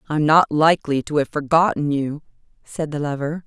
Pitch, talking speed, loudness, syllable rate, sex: 150 Hz, 175 wpm, -19 LUFS, 5.3 syllables/s, female